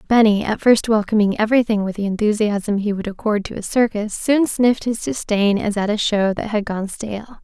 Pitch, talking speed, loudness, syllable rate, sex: 215 Hz, 210 wpm, -19 LUFS, 5.4 syllables/s, female